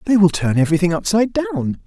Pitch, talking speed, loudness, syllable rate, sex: 175 Hz, 195 wpm, -17 LUFS, 6.6 syllables/s, male